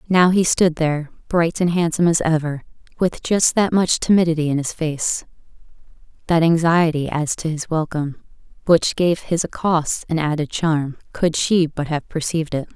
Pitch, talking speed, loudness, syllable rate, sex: 165 Hz, 170 wpm, -19 LUFS, 4.9 syllables/s, female